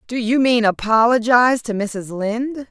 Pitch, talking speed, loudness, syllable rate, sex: 230 Hz, 155 wpm, -17 LUFS, 4.7 syllables/s, female